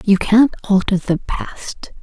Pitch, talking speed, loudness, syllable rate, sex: 195 Hz, 150 wpm, -16 LUFS, 3.5 syllables/s, female